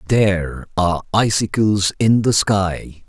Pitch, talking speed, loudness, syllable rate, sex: 100 Hz, 115 wpm, -17 LUFS, 3.8 syllables/s, male